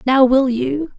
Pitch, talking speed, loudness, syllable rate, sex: 265 Hz, 180 wpm, -16 LUFS, 3.7 syllables/s, female